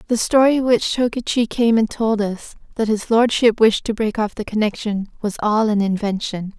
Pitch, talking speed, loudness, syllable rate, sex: 220 Hz, 190 wpm, -18 LUFS, 4.9 syllables/s, female